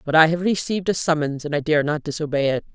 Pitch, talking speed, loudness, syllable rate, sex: 155 Hz, 260 wpm, -21 LUFS, 6.6 syllables/s, female